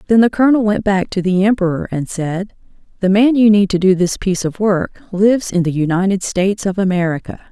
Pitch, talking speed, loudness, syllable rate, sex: 195 Hz, 215 wpm, -15 LUFS, 5.8 syllables/s, female